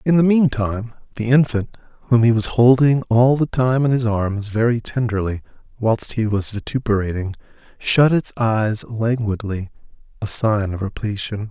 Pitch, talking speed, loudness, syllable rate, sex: 115 Hz, 150 wpm, -19 LUFS, 4.6 syllables/s, male